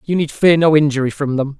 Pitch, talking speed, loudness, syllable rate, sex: 150 Hz, 265 wpm, -15 LUFS, 6.0 syllables/s, male